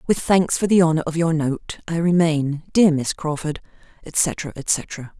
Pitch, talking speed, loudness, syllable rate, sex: 160 Hz, 175 wpm, -20 LUFS, 4.1 syllables/s, female